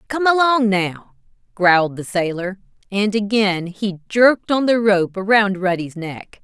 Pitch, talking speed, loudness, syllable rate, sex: 205 Hz, 150 wpm, -18 LUFS, 4.3 syllables/s, female